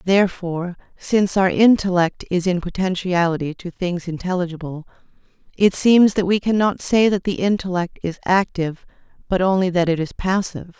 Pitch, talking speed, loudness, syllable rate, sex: 185 Hz, 150 wpm, -19 LUFS, 5.4 syllables/s, female